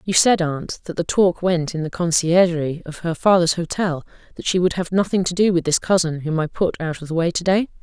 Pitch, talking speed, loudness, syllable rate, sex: 170 Hz, 255 wpm, -20 LUFS, 5.5 syllables/s, female